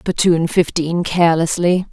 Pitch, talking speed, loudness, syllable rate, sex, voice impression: 170 Hz, 95 wpm, -16 LUFS, 4.5 syllables/s, female, feminine, middle-aged, tensed, powerful, bright, raspy, friendly, slightly reassuring, elegant, lively, slightly strict, sharp